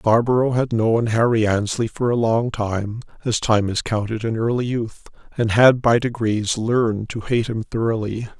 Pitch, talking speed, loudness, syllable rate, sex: 115 Hz, 180 wpm, -20 LUFS, 4.7 syllables/s, male